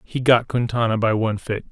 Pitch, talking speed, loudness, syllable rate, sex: 115 Hz, 210 wpm, -20 LUFS, 5.8 syllables/s, male